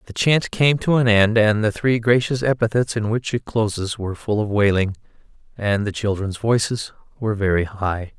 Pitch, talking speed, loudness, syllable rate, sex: 110 Hz, 190 wpm, -20 LUFS, 5.0 syllables/s, male